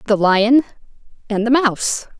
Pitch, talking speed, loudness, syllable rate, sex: 230 Hz, 135 wpm, -16 LUFS, 4.7 syllables/s, female